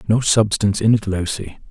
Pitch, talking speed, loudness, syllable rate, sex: 105 Hz, 175 wpm, -18 LUFS, 5.5 syllables/s, male